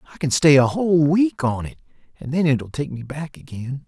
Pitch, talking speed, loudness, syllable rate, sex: 140 Hz, 230 wpm, -20 LUFS, 5.4 syllables/s, male